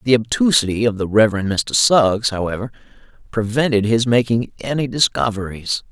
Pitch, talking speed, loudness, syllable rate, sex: 115 Hz, 130 wpm, -17 LUFS, 5.3 syllables/s, male